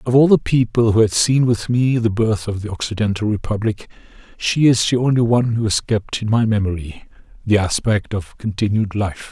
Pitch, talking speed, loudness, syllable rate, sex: 110 Hz, 200 wpm, -18 LUFS, 5.3 syllables/s, male